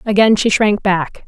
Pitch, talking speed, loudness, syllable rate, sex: 205 Hz, 190 wpm, -14 LUFS, 4.4 syllables/s, female